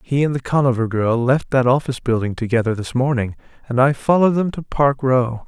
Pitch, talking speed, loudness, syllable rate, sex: 130 Hz, 210 wpm, -18 LUFS, 5.8 syllables/s, male